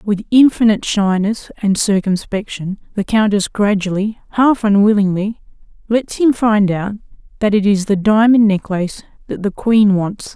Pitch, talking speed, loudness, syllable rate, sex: 205 Hz, 140 wpm, -15 LUFS, 4.6 syllables/s, female